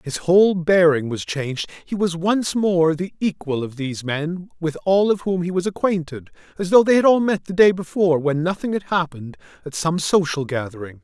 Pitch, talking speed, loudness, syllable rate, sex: 170 Hz, 205 wpm, -20 LUFS, 5.3 syllables/s, male